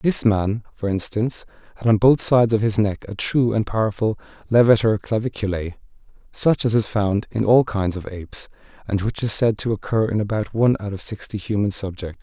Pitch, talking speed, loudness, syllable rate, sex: 105 Hz, 195 wpm, -20 LUFS, 5.4 syllables/s, male